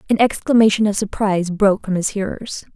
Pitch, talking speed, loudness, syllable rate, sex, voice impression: 205 Hz, 175 wpm, -18 LUFS, 6.1 syllables/s, female, very feminine, slightly young, slightly adult-like, very thin, tensed, slightly powerful, bright, soft, clear, fluent, very cute, intellectual, very refreshing, sincere, calm, very friendly, very reassuring, slightly unique, elegant, very sweet, lively, very kind